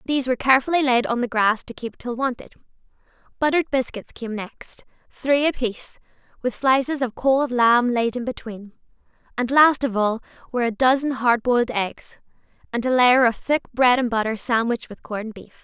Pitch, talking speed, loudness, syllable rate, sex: 245 Hz, 175 wpm, -21 LUFS, 5.4 syllables/s, female